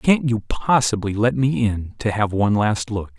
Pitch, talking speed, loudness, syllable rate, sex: 110 Hz, 205 wpm, -20 LUFS, 4.6 syllables/s, male